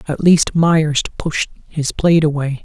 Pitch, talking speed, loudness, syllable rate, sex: 155 Hz, 160 wpm, -16 LUFS, 3.9 syllables/s, male